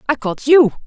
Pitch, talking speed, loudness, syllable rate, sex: 260 Hz, 210 wpm, -14 LUFS, 5.2 syllables/s, female